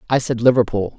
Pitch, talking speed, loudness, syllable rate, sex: 120 Hz, 185 wpm, -17 LUFS, 6.2 syllables/s, female